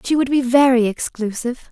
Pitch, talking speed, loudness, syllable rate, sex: 250 Hz, 175 wpm, -17 LUFS, 5.6 syllables/s, female